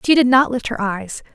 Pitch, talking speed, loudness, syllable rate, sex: 240 Hz, 270 wpm, -17 LUFS, 5.5 syllables/s, female